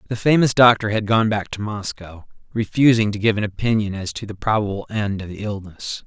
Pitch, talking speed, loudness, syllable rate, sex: 105 Hz, 210 wpm, -20 LUFS, 5.5 syllables/s, male